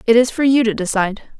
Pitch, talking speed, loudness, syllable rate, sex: 230 Hz, 260 wpm, -16 LUFS, 6.8 syllables/s, female